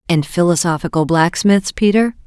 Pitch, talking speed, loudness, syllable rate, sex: 180 Hz, 105 wpm, -15 LUFS, 5.1 syllables/s, female